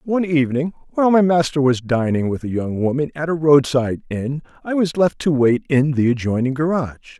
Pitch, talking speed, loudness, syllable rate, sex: 145 Hz, 200 wpm, -18 LUFS, 5.6 syllables/s, male